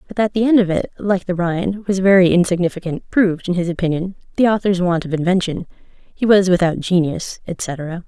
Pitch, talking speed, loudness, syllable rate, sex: 180 Hz, 195 wpm, -17 LUFS, 5.6 syllables/s, female